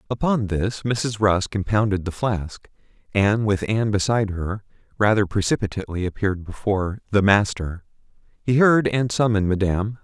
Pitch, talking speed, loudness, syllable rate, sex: 105 Hz, 140 wpm, -21 LUFS, 5.3 syllables/s, male